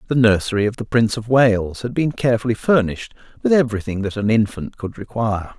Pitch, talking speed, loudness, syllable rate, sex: 115 Hz, 195 wpm, -19 LUFS, 6.3 syllables/s, male